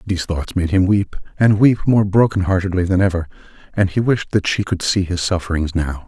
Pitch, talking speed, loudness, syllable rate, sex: 95 Hz, 215 wpm, -17 LUFS, 5.5 syllables/s, male